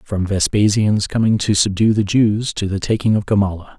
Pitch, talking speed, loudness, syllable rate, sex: 105 Hz, 190 wpm, -17 LUFS, 5.1 syllables/s, male